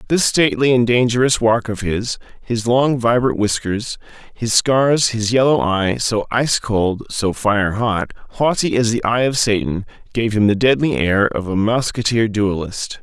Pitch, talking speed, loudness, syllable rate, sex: 115 Hz, 170 wpm, -17 LUFS, 4.5 syllables/s, male